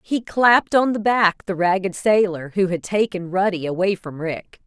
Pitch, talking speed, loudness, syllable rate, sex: 190 Hz, 195 wpm, -20 LUFS, 4.7 syllables/s, female